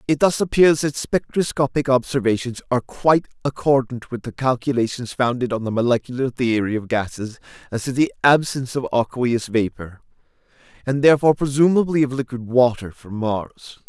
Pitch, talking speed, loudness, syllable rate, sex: 130 Hz, 145 wpm, -20 LUFS, 5.5 syllables/s, male